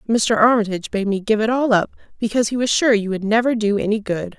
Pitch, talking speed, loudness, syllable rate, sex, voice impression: 220 Hz, 245 wpm, -18 LUFS, 6.4 syllables/s, female, feminine, adult-like, tensed, slightly weak, slightly dark, soft, clear, intellectual, calm, friendly, reassuring, elegant, slightly lively, slightly sharp